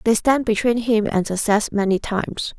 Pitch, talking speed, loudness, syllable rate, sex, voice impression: 215 Hz, 185 wpm, -20 LUFS, 4.9 syllables/s, female, very feminine, slightly adult-like, very thin, slightly tensed, slightly weak, dark, slightly hard, muffled, fluent, raspy, cute, intellectual, slightly refreshing, sincere, very calm, friendly, reassuring, very unique, slightly elegant, wild, very sweet, slightly lively, very kind, slightly sharp, very modest, light